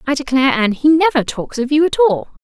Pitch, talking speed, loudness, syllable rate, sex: 275 Hz, 245 wpm, -15 LUFS, 6.2 syllables/s, female